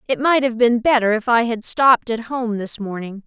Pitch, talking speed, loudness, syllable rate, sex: 235 Hz, 240 wpm, -18 LUFS, 5.2 syllables/s, female